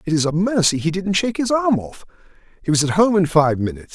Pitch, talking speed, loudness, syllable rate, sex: 175 Hz, 260 wpm, -18 LUFS, 6.5 syllables/s, male